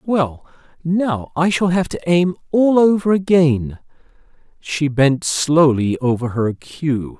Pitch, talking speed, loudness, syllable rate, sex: 155 Hz, 135 wpm, -17 LUFS, 3.5 syllables/s, male